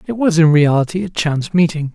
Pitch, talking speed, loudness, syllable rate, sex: 165 Hz, 215 wpm, -15 LUFS, 6.1 syllables/s, male